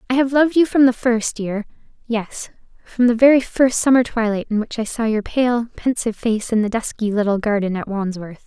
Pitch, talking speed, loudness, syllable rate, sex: 230 Hz, 205 wpm, -18 LUFS, 5.4 syllables/s, female